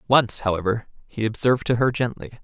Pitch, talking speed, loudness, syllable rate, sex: 115 Hz, 175 wpm, -23 LUFS, 5.9 syllables/s, male